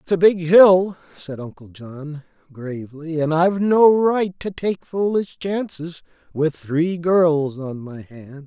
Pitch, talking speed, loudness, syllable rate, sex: 165 Hz, 155 wpm, -18 LUFS, 3.7 syllables/s, male